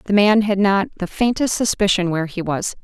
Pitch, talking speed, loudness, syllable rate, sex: 195 Hz, 210 wpm, -18 LUFS, 5.6 syllables/s, female